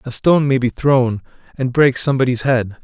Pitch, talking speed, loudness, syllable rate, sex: 130 Hz, 190 wpm, -16 LUFS, 5.4 syllables/s, male